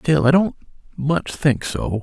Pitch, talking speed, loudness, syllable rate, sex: 130 Hz, 180 wpm, -19 LUFS, 3.8 syllables/s, male